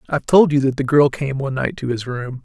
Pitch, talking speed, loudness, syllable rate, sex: 140 Hz, 320 wpm, -18 LUFS, 6.2 syllables/s, male